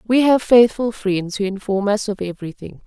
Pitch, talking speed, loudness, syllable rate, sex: 210 Hz, 190 wpm, -18 LUFS, 5.1 syllables/s, female